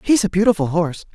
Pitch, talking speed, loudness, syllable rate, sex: 185 Hz, 210 wpm, -18 LUFS, 7.1 syllables/s, male